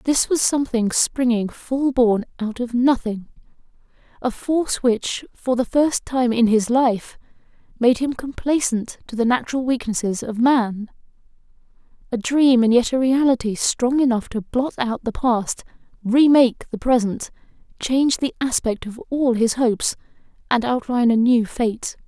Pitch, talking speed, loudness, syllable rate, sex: 245 Hz, 150 wpm, -20 LUFS, 4.5 syllables/s, female